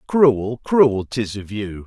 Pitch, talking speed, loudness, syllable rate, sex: 115 Hz, 160 wpm, -19 LUFS, 2.9 syllables/s, male